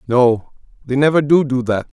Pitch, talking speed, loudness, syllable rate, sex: 130 Hz, 180 wpm, -16 LUFS, 4.8 syllables/s, male